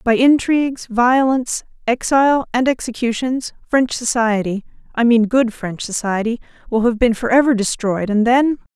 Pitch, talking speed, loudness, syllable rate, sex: 240 Hz, 125 wpm, -17 LUFS, 4.8 syllables/s, female